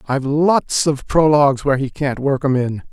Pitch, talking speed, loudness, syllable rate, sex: 140 Hz, 205 wpm, -17 LUFS, 5.2 syllables/s, male